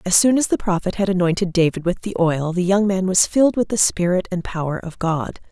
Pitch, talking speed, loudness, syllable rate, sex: 185 Hz, 250 wpm, -19 LUFS, 5.7 syllables/s, female